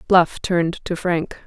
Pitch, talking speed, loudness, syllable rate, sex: 175 Hz, 165 wpm, -20 LUFS, 4.1 syllables/s, female